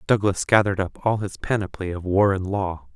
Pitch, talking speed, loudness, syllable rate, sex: 100 Hz, 205 wpm, -23 LUFS, 5.4 syllables/s, male